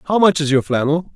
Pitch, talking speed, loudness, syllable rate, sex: 155 Hz, 260 wpm, -16 LUFS, 5.5 syllables/s, male